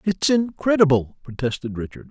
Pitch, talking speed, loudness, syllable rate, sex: 150 Hz, 115 wpm, -21 LUFS, 5.1 syllables/s, male